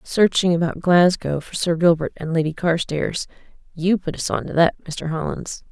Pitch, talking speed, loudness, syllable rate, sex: 165 Hz, 170 wpm, -20 LUFS, 4.8 syllables/s, female